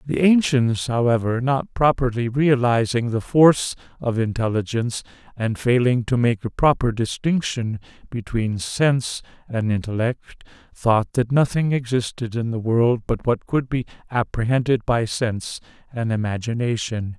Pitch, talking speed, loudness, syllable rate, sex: 120 Hz, 130 wpm, -21 LUFS, 4.6 syllables/s, male